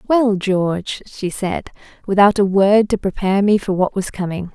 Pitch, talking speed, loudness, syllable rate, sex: 195 Hz, 185 wpm, -17 LUFS, 4.8 syllables/s, female